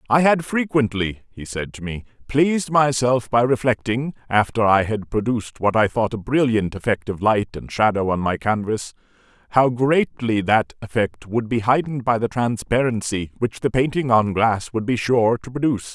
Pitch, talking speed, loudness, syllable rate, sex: 115 Hz, 180 wpm, -20 LUFS, 4.9 syllables/s, male